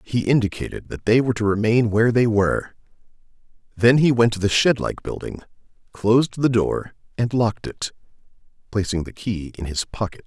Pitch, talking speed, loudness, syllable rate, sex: 110 Hz, 175 wpm, -21 LUFS, 5.5 syllables/s, male